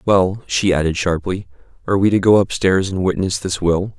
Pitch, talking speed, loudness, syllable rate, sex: 95 Hz, 195 wpm, -17 LUFS, 5.3 syllables/s, male